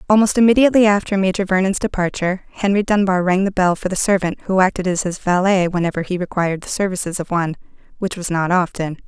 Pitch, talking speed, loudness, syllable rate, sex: 185 Hz, 200 wpm, -18 LUFS, 6.6 syllables/s, female